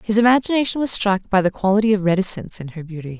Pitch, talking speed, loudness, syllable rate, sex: 200 Hz, 225 wpm, -18 LUFS, 7.1 syllables/s, female